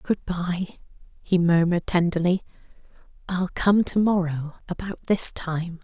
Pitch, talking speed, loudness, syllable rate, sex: 180 Hz, 125 wpm, -23 LUFS, 4.2 syllables/s, female